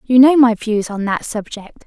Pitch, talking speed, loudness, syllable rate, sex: 230 Hz, 225 wpm, -15 LUFS, 4.6 syllables/s, female